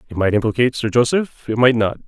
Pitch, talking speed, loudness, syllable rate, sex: 120 Hz, 230 wpm, -17 LUFS, 6.7 syllables/s, male